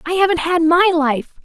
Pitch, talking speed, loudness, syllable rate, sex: 330 Hz, 210 wpm, -15 LUFS, 5.0 syllables/s, female